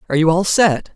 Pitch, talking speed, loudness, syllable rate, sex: 175 Hz, 250 wpm, -15 LUFS, 6.8 syllables/s, female